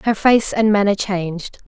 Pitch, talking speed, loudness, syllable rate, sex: 200 Hz, 180 wpm, -17 LUFS, 4.5 syllables/s, female